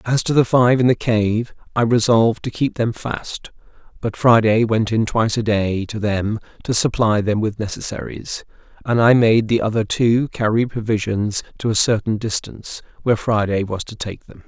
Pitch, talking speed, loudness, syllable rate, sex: 110 Hz, 185 wpm, -18 LUFS, 4.9 syllables/s, male